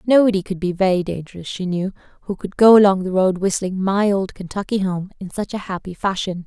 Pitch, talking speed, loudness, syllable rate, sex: 190 Hz, 215 wpm, -19 LUFS, 5.8 syllables/s, female